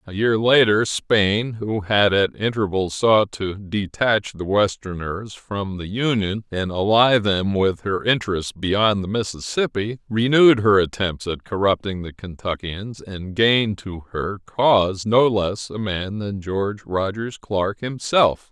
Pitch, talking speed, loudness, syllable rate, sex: 105 Hz, 150 wpm, -20 LUFS, 3.9 syllables/s, male